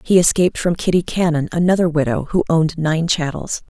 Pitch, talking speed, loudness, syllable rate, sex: 165 Hz, 175 wpm, -17 LUFS, 5.9 syllables/s, female